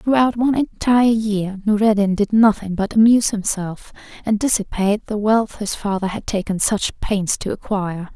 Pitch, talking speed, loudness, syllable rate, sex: 210 Hz, 160 wpm, -18 LUFS, 5.1 syllables/s, female